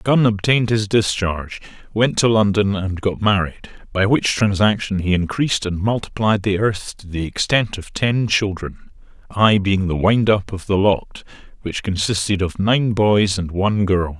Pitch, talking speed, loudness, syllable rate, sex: 100 Hz, 175 wpm, -18 LUFS, 4.6 syllables/s, male